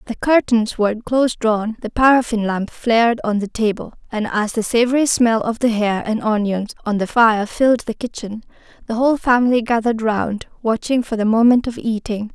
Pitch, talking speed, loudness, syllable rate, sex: 225 Hz, 190 wpm, -18 LUFS, 5.3 syllables/s, female